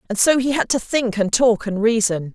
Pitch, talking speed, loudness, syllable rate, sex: 225 Hz, 255 wpm, -18 LUFS, 5.1 syllables/s, female